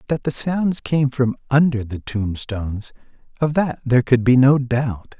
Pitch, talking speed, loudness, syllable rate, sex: 130 Hz, 175 wpm, -19 LUFS, 4.4 syllables/s, male